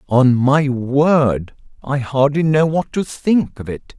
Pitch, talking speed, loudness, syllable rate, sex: 140 Hz, 165 wpm, -16 LUFS, 3.4 syllables/s, male